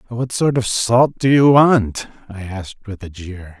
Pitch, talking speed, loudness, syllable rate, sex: 110 Hz, 200 wpm, -15 LUFS, 4.2 syllables/s, male